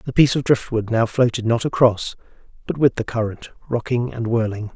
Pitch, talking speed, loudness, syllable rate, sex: 120 Hz, 190 wpm, -20 LUFS, 5.3 syllables/s, male